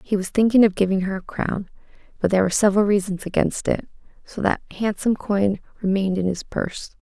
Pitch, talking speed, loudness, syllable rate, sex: 195 Hz, 195 wpm, -21 LUFS, 6.4 syllables/s, female